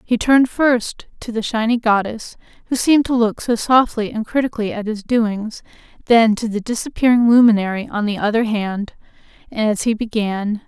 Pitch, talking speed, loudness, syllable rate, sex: 225 Hz, 170 wpm, -17 LUFS, 5.1 syllables/s, female